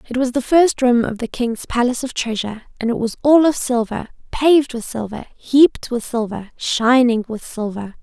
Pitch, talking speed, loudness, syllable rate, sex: 245 Hz, 195 wpm, -18 LUFS, 5.2 syllables/s, female